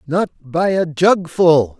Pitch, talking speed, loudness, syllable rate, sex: 165 Hz, 135 wpm, -16 LUFS, 3.0 syllables/s, male